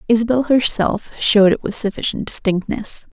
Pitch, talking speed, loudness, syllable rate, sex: 215 Hz, 135 wpm, -17 LUFS, 5.1 syllables/s, female